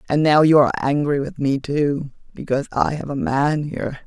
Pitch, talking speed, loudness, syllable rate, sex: 145 Hz, 205 wpm, -19 LUFS, 5.4 syllables/s, female